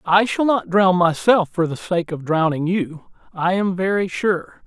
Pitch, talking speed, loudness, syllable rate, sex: 180 Hz, 195 wpm, -19 LUFS, 4.2 syllables/s, male